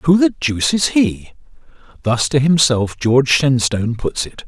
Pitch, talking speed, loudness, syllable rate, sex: 135 Hz, 160 wpm, -16 LUFS, 4.6 syllables/s, male